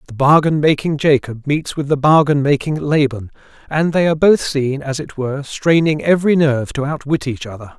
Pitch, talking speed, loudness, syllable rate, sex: 145 Hz, 195 wpm, -16 LUFS, 5.4 syllables/s, male